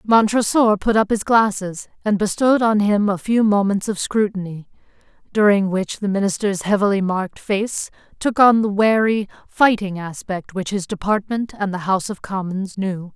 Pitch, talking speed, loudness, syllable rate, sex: 200 Hz, 165 wpm, -19 LUFS, 4.8 syllables/s, female